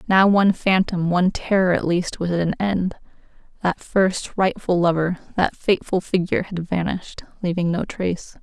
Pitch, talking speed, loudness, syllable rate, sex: 180 Hz, 165 wpm, -21 LUFS, 5.1 syllables/s, female